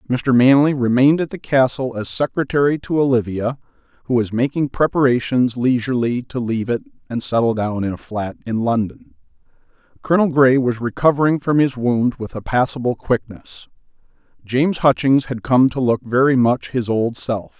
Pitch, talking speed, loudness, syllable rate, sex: 125 Hz, 165 wpm, -18 LUFS, 5.2 syllables/s, male